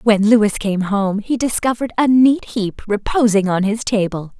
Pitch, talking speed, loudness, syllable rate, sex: 215 Hz, 175 wpm, -17 LUFS, 4.5 syllables/s, female